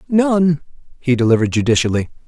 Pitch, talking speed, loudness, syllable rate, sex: 140 Hz, 105 wpm, -16 LUFS, 6.3 syllables/s, male